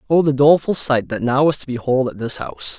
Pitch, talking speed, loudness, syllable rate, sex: 135 Hz, 260 wpm, -17 LUFS, 6.2 syllables/s, male